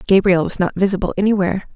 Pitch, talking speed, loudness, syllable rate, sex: 190 Hz, 170 wpm, -17 LUFS, 7.1 syllables/s, female